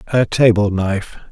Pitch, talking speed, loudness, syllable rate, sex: 105 Hz, 135 wpm, -16 LUFS, 4.8 syllables/s, male